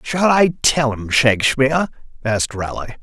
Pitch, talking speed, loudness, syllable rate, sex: 130 Hz, 140 wpm, -17 LUFS, 4.9 syllables/s, male